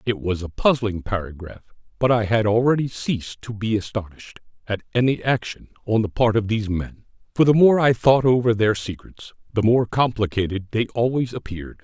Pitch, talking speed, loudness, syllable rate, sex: 110 Hz, 185 wpm, -21 LUFS, 5.5 syllables/s, male